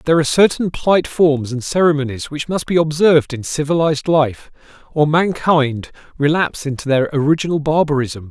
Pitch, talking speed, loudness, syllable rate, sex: 150 Hz, 150 wpm, -16 LUFS, 5.8 syllables/s, male